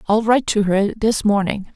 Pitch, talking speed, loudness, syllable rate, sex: 210 Hz, 205 wpm, -18 LUFS, 5.0 syllables/s, female